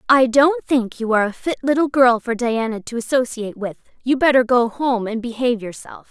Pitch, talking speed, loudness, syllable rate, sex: 245 Hz, 205 wpm, -18 LUFS, 5.5 syllables/s, female